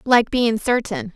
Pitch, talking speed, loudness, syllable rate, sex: 235 Hz, 155 wpm, -19 LUFS, 3.8 syllables/s, female